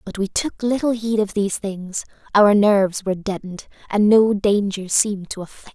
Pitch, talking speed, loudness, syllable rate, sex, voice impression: 205 Hz, 200 wpm, -19 LUFS, 5.5 syllables/s, female, feminine, slightly young, slightly relaxed, powerful, bright, slightly soft, cute, slightly refreshing, friendly, reassuring, lively, slightly kind